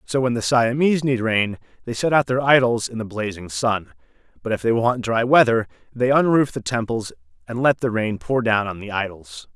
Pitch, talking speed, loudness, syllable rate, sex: 115 Hz, 215 wpm, -20 LUFS, 5.2 syllables/s, male